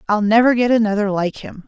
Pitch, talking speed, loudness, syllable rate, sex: 215 Hz, 215 wpm, -16 LUFS, 6.0 syllables/s, female